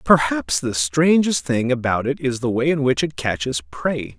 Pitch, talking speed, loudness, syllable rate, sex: 130 Hz, 200 wpm, -20 LUFS, 4.5 syllables/s, male